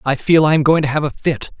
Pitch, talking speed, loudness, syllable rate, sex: 150 Hz, 340 wpm, -15 LUFS, 6.2 syllables/s, male